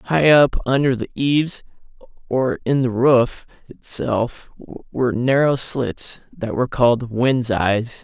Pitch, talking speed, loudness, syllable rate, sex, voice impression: 125 Hz, 135 wpm, -19 LUFS, 3.6 syllables/s, male, masculine, adult-like, tensed, slightly bright, soft, clear, slightly halting, cool, intellectual, mature, friendly, wild, lively, slightly intense